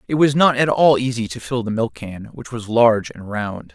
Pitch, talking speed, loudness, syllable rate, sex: 120 Hz, 255 wpm, -18 LUFS, 5.1 syllables/s, male